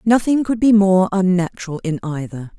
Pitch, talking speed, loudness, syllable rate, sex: 195 Hz, 165 wpm, -17 LUFS, 5.2 syllables/s, female